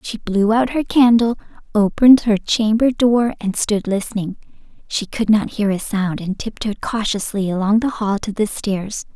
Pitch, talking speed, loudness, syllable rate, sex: 215 Hz, 175 wpm, -18 LUFS, 4.6 syllables/s, female